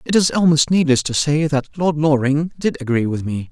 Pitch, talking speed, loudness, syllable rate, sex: 145 Hz, 220 wpm, -17 LUFS, 5.2 syllables/s, male